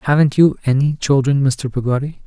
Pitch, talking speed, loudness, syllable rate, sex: 140 Hz, 160 wpm, -16 LUFS, 5.4 syllables/s, male